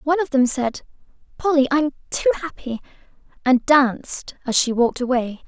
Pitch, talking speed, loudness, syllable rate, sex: 270 Hz, 155 wpm, -20 LUFS, 5.3 syllables/s, female